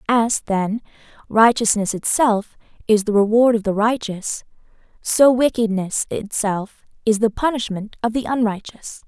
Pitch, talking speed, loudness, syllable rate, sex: 220 Hz, 125 wpm, -19 LUFS, 4.3 syllables/s, female